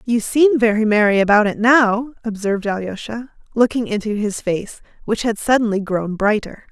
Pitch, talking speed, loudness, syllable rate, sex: 220 Hz, 160 wpm, -17 LUFS, 4.9 syllables/s, female